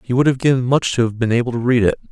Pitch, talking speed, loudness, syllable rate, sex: 125 Hz, 340 wpm, -17 LUFS, 7.3 syllables/s, male